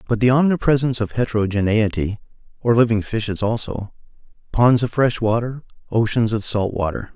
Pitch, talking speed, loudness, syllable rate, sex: 115 Hz, 125 wpm, -20 LUFS, 5.6 syllables/s, male